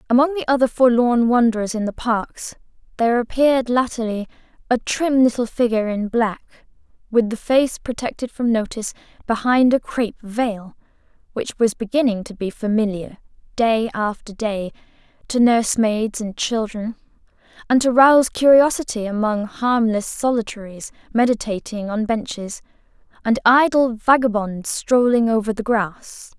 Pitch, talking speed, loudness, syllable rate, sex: 230 Hz, 130 wpm, -19 LUFS, 4.3 syllables/s, female